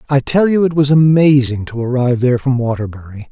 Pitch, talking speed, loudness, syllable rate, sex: 130 Hz, 200 wpm, -14 LUFS, 6.1 syllables/s, male